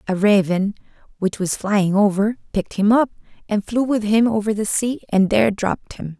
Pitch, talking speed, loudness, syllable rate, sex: 210 Hz, 195 wpm, -19 LUFS, 5.2 syllables/s, female